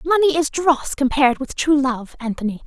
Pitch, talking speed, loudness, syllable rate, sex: 280 Hz, 180 wpm, -19 LUFS, 5.2 syllables/s, female